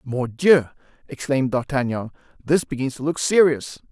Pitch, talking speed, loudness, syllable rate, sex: 140 Hz, 125 wpm, -21 LUFS, 4.9 syllables/s, male